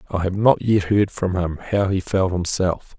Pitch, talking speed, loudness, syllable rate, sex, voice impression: 95 Hz, 220 wpm, -20 LUFS, 4.3 syllables/s, male, masculine, adult-like, slightly bright, fluent, cool, sincere, calm, slightly mature, friendly, wild, slightly kind, slightly modest